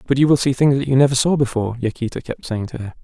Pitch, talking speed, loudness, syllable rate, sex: 130 Hz, 295 wpm, -18 LUFS, 7.1 syllables/s, male